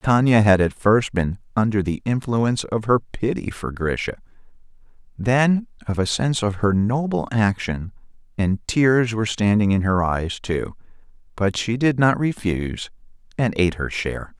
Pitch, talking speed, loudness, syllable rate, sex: 110 Hz, 160 wpm, -21 LUFS, 4.7 syllables/s, male